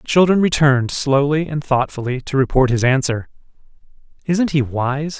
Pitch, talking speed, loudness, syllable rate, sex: 140 Hz, 150 wpm, -17 LUFS, 5.0 syllables/s, male